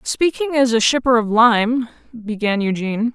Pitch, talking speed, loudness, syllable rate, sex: 235 Hz, 155 wpm, -17 LUFS, 4.6 syllables/s, female